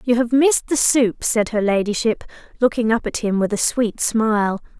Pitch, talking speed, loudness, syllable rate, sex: 225 Hz, 200 wpm, -19 LUFS, 5.0 syllables/s, female